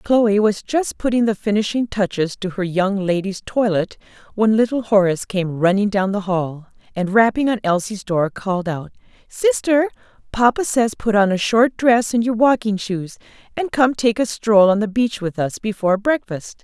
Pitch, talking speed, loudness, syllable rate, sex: 210 Hz, 185 wpm, -18 LUFS, 4.8 syllables/s, female